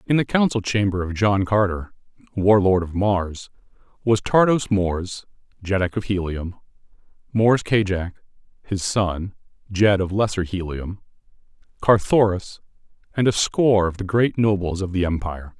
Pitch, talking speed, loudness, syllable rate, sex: 100 Hz, 135 wpm, -21 LUFS, 4.6 syllables/s, male